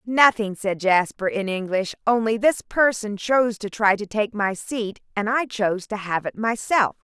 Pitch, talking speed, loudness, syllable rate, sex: 215 Hz, 185 wpm, -22 LUFS, 4.6 syllables/s, female